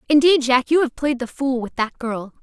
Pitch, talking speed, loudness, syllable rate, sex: 265 Hz, 250 wpm, -19 LUFS, 5.1 syllables/s, female